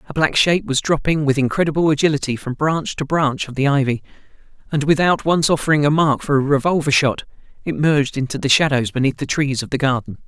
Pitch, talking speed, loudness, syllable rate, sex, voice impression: 145 Hz, 210 wpm, -18 LUFS, 6.1 syllables/s, male, masculine, adult-like, slightly fluent, slightly sincere, slightly kind